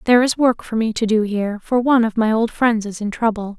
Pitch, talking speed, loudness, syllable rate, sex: 225 Hz, 285 wpm, -18 LUFS, 6.1 syllables/s, female